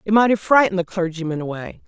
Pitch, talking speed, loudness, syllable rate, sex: 190 Hz, 225 wpm, -19 LUFS, 6.9 syllables/s, female